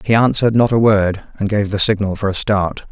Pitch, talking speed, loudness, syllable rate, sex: 105 Hz, 245 wpm, -16 LUFS, 5.5 syllables/s, male